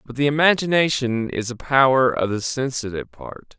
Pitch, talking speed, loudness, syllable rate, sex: 130 Hz, 165 wpm, -20 LUFS, 5.2 syllables/s, male